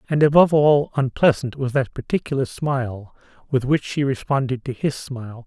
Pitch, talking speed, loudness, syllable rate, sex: 135 Hz, 165 wpm, -20 LUFS, 5.3 syllables/s, male